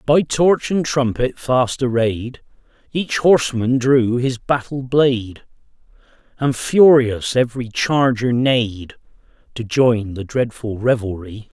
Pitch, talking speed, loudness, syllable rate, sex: 125 Hz, 115 wpm, -17 LUFS, 3.8 syllables/s, male